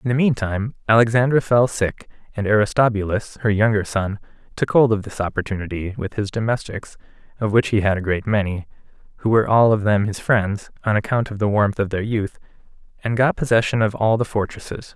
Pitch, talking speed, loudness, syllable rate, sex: 110 Hz, 195 wpm, -20 LUFS, 5.7 syllables/s, male